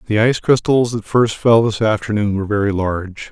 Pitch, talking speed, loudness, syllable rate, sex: 110 Hz, 200 wpm, -16 LUFS, 5.8 syllables/s, male